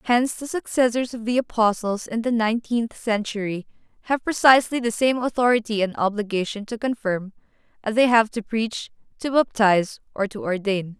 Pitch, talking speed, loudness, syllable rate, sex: 225 Hz, 160 wpm, -22 LUFS, 5.3 syllables/s, female